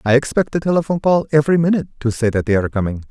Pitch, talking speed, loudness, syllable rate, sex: 135 Hz, 250 wpm, -17 LUFS, 8.2 syllables/s, male